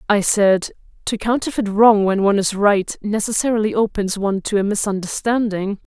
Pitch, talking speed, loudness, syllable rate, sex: 205 Hz, 150 wpm, -18 LUFS, 5.3 syllables/s, female